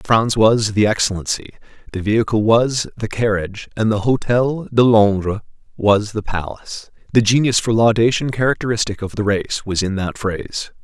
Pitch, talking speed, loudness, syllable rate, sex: 110 Hz, 160 wpm, -17 LUFS, 5.1 syllables/s, male